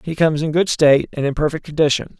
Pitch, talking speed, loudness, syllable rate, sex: 150 Hz, 245 wpm, -17 LUFS, 6.8 syllables/s, male